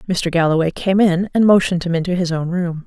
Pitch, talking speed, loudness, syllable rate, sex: 175 Hz, 230 wpm, -17 LUFS, 6.0 syllables/s, female